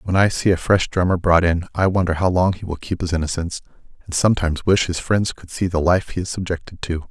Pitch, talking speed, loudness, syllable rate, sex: 90 Hz, 255 wpm, -20 LUFS, 6.1 syllables/s, male